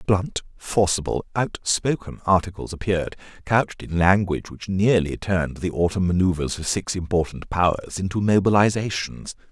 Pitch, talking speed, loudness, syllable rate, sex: 95 Hz, 125 wpm, -22 LUFS, 5.1 syllables/s, male